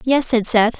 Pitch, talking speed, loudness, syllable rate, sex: 235 Hz, 225 wpm, -16 LUFS, 4.4 syllables/s, female